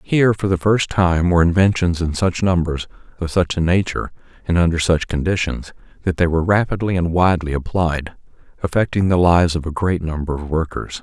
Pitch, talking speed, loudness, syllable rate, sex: 85 Hz, 185 wpm, -18 LUFS, 5.8 syllables/s, male